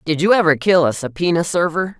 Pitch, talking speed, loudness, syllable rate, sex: 165 Hz, 210 wpm, -16 LUFS, 5.8 syllables/s, female